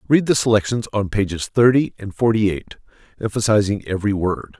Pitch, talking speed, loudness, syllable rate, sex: 105 Hz, 155 wpm, -19 LUFS, 5.8 syllables/s, male